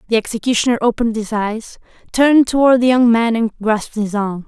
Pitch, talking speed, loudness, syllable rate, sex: 230 Hz, 190 wpm, -15 LUFS, 6.0 syllables/s, female